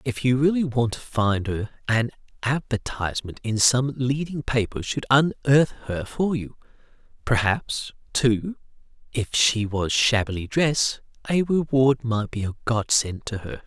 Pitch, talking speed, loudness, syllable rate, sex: 120 Hz, 150 wpm, -23 LUFS, 4.2 syllables/s, male